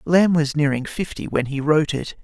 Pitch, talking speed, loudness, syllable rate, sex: 150 Hz, 215 wpm, -20 LUFS, 5.2 syllables/s, male